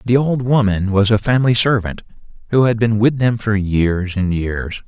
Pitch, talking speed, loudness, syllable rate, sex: 110 Hz, 195 wpm, -16 LUFS, 4.7 syllables/s, male